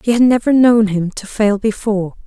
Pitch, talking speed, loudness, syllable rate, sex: 215 Hz, 210 wpm, -14 LUFS, 5.2 syllables/s, female